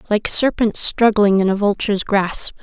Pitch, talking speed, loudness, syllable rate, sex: 205 Hz, 160 wpm, -16 LUFS, 4.6 syllables/s, female